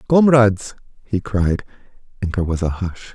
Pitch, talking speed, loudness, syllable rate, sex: 100 Hz, 155 wpm, -19 LUFS, 5.3 syllables/s, male